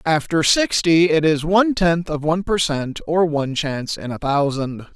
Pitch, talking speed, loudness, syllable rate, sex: 160 Hz, 195 wpm, -19 LUFS, 4.8 syllables/s, male